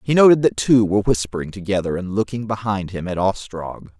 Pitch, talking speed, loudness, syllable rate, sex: 100 Hz, 195 wpm, -19 LUFS, 5.7 syllables/s, male